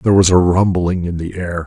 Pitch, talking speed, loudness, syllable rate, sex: 90 Hz, 250 wpm, -15 LUFS, 5.5 syllables/s, male